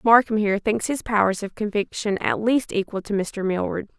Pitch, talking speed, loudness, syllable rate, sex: 210 Hz, 195 wpm, -23 LUFS, 5.3 syllables/s, female